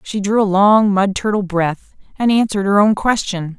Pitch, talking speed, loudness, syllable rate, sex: 200 Hz, 200 wpm, -15 LUFS, 4.9 syllables/s, female